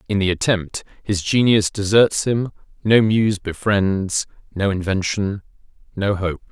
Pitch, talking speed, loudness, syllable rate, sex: 100 Hz, 130 wpm, -19 LUFS, 4.0 syllables/s, male